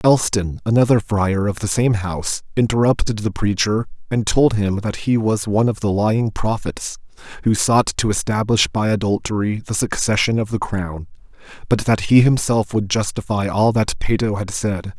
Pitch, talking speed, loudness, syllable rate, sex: 105 Hz, 170 wpm, -19 LUFS, 4.9 syllables/s, male